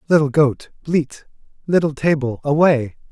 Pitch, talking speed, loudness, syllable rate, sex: 145 Hz, 115 wpm, -18 LUFS, 4.4 syllables/s, male